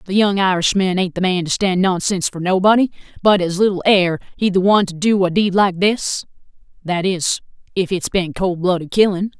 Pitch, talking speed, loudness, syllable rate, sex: 185 Hz, 200 wpm, -17 LUFS, 5.4 syllables/s, female